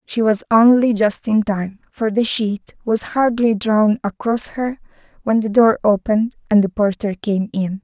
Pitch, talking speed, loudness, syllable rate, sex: 215 Hz, 175 wpm, -17 LUFS, 4.3 syllables/s, female